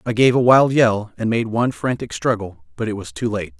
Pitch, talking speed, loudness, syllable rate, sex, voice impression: 115 Hz, 250 wpm, -19 LUFS, 5.5 syllables/s, male, masculine, adult-like, tensed, powerful, clear, fluent, cool, intellectual, slightly mature, wild, lively, slightly strict